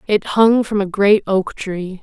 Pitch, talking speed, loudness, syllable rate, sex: 200 Hz, 205 wpm, -16 LUFS, 3.8 syllables/s, female